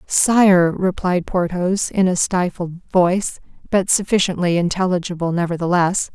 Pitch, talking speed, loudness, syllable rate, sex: 180 Hz, 105 wpm, -18 LUFS, 4.4 syllables/s, female